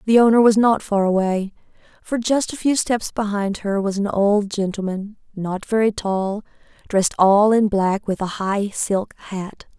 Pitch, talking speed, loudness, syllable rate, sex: 205 Hz, 180 wpm, -19 LUFS, 4.4 syllables/s, female